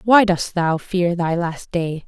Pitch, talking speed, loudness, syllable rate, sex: 175 Hz, 200 wpm, -19 LUFS, 3.6 syllables/s, female